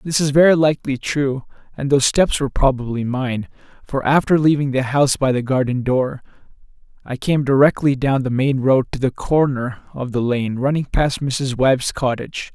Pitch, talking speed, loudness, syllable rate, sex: 135 Hz, 180 wpm, -18 LUFS, 5.1 syllables/s, male